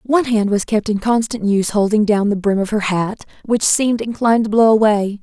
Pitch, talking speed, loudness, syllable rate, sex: 215 Hz, 230 wpm, -16 LUFS, 5.7 syllables/s, female